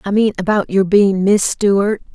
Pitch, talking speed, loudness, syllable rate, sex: 200 Hz, 195 wpm, -15 LUFS, 4.8 syllables/s, female